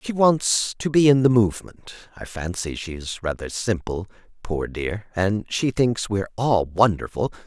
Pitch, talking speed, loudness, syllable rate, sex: 105 Hz, 160 wpm, -22 LUFS, 4.4 syllables/s, male